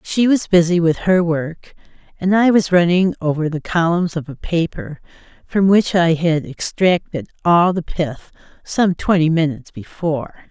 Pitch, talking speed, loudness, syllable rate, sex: 170 Hz, 160 wpm, -17 LUFS, 4.5 syllables/s, female